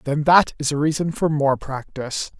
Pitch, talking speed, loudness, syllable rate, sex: 145 Hz, 200 wpm, -20 LUFS, 5.1 syllables/s, male